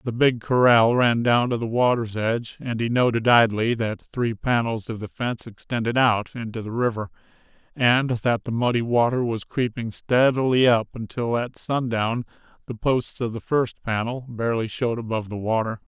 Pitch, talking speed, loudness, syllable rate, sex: 115 Hz, 175 wpm, -23 LUFS, 5.0 syllables/s, male